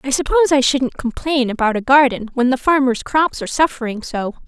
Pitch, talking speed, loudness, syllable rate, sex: 260 Hz, 200 wpm, -17 LUFS, 5.9 syllables/s, female